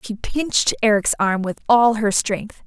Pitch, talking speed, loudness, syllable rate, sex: 215 Hz, 180 wpm, -19 LUFS, 4.3 syllables/s, female